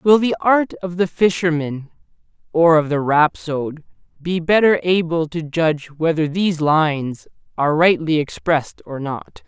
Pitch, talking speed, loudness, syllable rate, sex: 165 Hz, 145 wpm, -18 LUFS, 4.6 syllables/s, male